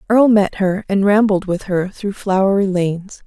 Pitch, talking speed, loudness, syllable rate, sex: 195 Hz, 185 wpm, -16 LUFS, 4.9 syllables/s, female